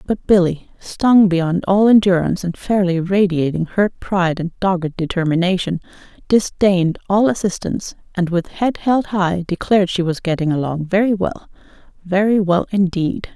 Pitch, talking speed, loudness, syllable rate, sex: 185 Hz, 145 wpm, -17 LUFS, 5.0 syllables/s, female